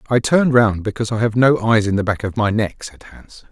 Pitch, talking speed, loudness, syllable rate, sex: 110 Hz, 275 wpm, -17 LUFS, 5.5 syllables/s, male